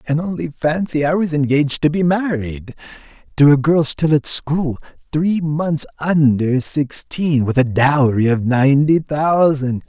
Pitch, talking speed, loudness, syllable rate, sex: 145 Hz, 145 wpm, -16 LUFS, 4.2 syllables/s, male